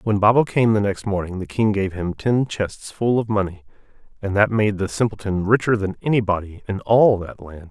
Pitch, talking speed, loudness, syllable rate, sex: 100 Hz, 210 wpm, -20 LUFS, 5.2 syllables/s, male